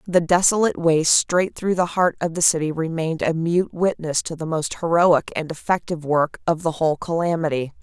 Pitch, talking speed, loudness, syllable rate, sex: 165 Hz, 190 wpm, -20 LUFS, 5.5 syllables/s, female